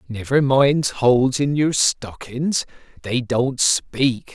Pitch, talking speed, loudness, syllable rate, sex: 130 Hz, 110 wpm, -19 LUFS, 3.2 syllables/s, male